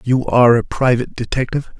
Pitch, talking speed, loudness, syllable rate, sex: 125 Hz, 165 wpm, -16 LUFS, 6.6 syllables/s, male